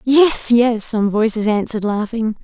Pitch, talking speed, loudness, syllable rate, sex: 225 Hz, 150 wpm, -16 LUFS, 4.4 syllables/s, female